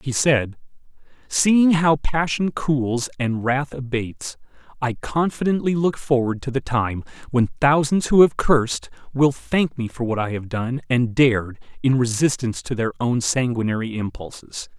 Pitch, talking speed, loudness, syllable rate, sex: 130 Hz, 155 wpm, -21 LUFS, 4.5 syllables/s, male